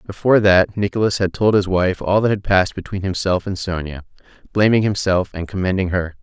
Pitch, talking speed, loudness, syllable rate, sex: 95 Hz, 195 wpm, -18 LUFS, 5.7 syllables/s, male